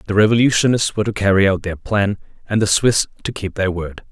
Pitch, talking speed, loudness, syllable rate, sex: 100 Hz, 220 wpm, -17 LUFS, 6.1 syllables/s, male